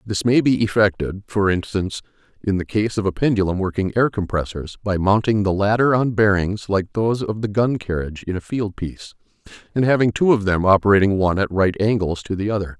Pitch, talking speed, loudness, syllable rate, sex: 100 Hz, 205 wpm, -20 LUFS, 5.8 syllables/s, male